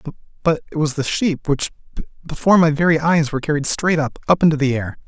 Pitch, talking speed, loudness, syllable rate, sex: 150 Hz, 190 wpm, -18 LUFS, 6.5 syllables/s, male